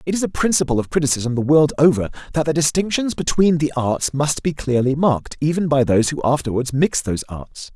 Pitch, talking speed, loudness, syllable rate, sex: 145 Hz, 210 wpm, -19 LUFS, 5.8 syllables/s, male